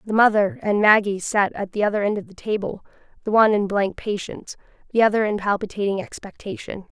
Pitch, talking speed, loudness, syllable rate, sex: 205 Hz, 190 wpm, -21 LUFS, 6.0 syllables/s, female